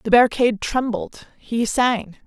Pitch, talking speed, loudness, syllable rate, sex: 230 Hz, 130 wpm, -20 LUFS, 4.5 syllables/s, female